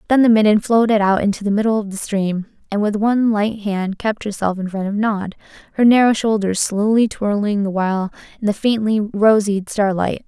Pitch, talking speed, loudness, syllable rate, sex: 210 Hz, 200 wpm, -17 LUFS, 5.3 syllables/s, female